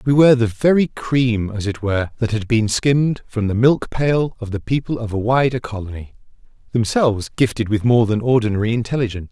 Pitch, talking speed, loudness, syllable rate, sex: 115 Hz, 195 wpm, -18 LUFS, 5.8 syllables/s, male